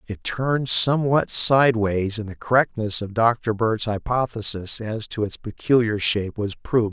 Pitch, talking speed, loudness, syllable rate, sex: 110 Hz, 155 wpm, -21 LUFS, 4.7 syllables/s, male